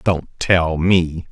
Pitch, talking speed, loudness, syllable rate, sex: 85 Hz, 135 wpm, -17 LUFS, 2.7 syllables/s, male